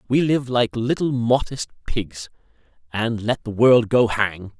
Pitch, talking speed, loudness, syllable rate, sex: 115 Hz, 155 wpm, -20 LUFS, 3.9 syllables/s, male